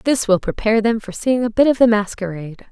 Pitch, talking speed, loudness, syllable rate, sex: 220 Hz, 245 wpm, -17 LUFS, 6.2 syllables/s, female